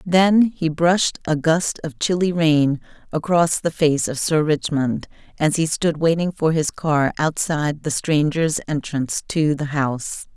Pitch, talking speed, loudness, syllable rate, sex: 155 Hz, 160 wpm, -20 LUFS, 4.2 syllables/s, female